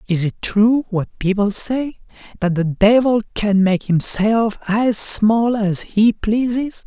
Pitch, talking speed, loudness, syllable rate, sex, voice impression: 215 Hz, 150 wpm, -17 LUFS, 3.5 syllables/s, male, very masculine, middle-aged, very old, thick, tensed, powerful, bright, soft, very muffled, very raspy, slightly cool, intellectual, very refreshing, very sincere, very calm, slightly mature, friendly, reassuring, very unique, slightly elegant, slightly sweet, lively, kind, slightly intense, slightly sharp, slightly modest